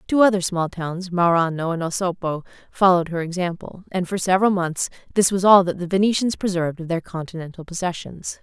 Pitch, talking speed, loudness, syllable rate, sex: 180 Hz, 180 wpm, -21 LUFS, 5.9 syllables/s, female